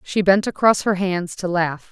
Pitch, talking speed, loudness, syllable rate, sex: 185 Hz, 220 wpm, -19 LUFS, 4.4 syllables/s, female